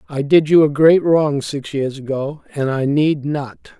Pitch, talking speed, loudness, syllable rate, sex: 145 Hz, 205 wpm, -17 LUFS, 4.1 syllables/s, male